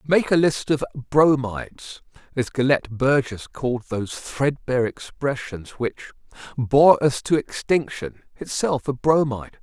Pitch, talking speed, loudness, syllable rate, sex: 135 Hz, 120 wpm, -22 LUFS, 4.4 syllables/s, male